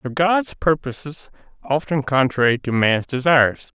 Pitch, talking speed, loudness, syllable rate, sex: 140 Hz, 125 wpm, -19 LUFS, 4.8 syllables/s, male